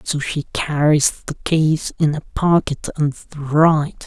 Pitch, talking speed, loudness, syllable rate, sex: 150 Hz, 160 wpm, -18 LUFS, 3.8 syllables/s, male